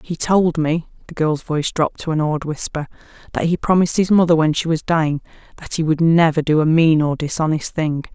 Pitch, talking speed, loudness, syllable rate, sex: 160 Hz, 205 wpm, -18 LUFS, 5.8 syllables/s, female